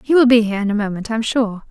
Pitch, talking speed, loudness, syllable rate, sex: 225 Hz, 350 wpm, -17 LUFS, 7.5 syllables/s, female